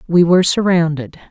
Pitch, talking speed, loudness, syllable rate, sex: 170 Hz, 140 wpm, -14 LUFS, 5.8 syllables/s, female